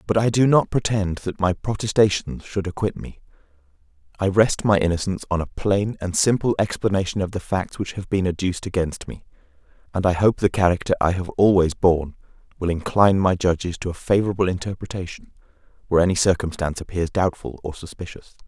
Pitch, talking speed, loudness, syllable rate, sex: 95 Hz, 175 wpm, -21 LUFS, 6.0 syllables/s, male